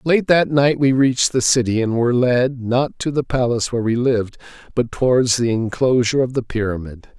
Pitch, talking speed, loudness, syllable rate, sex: 125 Hz, 200 wpm, -18 LUFS, 5.5 syllables/s, male